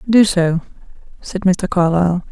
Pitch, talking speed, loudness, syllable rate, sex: 180 Hz, 130 wpm, -16 LUFS, 4.7 syllables/s, female